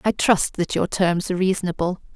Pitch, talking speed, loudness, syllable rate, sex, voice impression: 185 Hz, 195 wpm, -21 LUFS, 5.6 syllables/s, female, feminine, middle-aged, tensed, powerful, clear, slightly halting, intellectual, calm, elegant, strict, slightly sharp